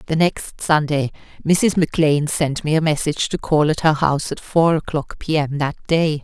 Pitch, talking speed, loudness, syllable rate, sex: 155 Hz, 200 wpm, -19 LUFS, 5.0 syllables/s, female